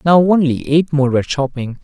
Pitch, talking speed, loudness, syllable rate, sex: 145 Hz, 195 wpm, -15 LUFS, 5.3 syllables/s, male